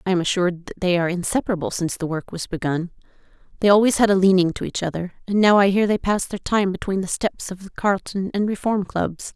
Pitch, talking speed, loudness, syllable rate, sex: 190 Hz, 235 wpm, -21 LUFS, 6.3 syllables/s, female